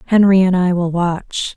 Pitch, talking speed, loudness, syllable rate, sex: 180 Hz, 190 wpm, -15 LUFS, 4.3 syllables/s, female